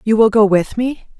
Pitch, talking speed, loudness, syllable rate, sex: 220 Hz, 250 wpm, -14 LUFS, 4.9 syllables/s, female